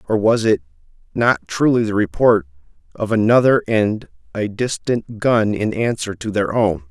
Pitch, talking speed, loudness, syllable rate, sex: 105 Hz, 155 wpm, -18 LUFS, 4.5 syllables/s, male